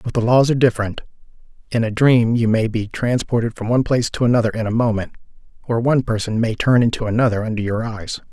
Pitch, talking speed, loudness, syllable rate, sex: 115 Hz, 215 wpm, -18 LUFS, 6.7 syllables/s, male